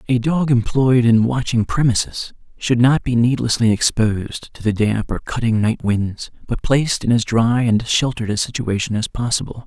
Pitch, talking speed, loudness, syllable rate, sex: 120 Hz, 180 wpm, -18 LUFS, 5.0 syllables/s, male